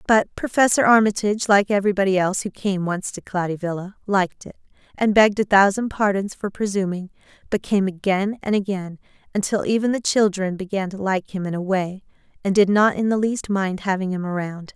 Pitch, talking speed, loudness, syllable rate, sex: 195 Hz, 190 wpm, -21 LUFS, 5.6 syllables/s, female